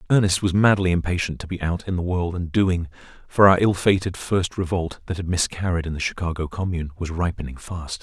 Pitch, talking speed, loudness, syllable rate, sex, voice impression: 90 Hz, 210 wpm, -22 LUFS, 5.7 syllables/s, male, masculine, very adult-like, thick, slightly muffled, sincere, slightly wild